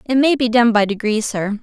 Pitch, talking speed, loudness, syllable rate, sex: 230 Hz, 260 wpm, -16 LUFS, 5.2 syllables/s, female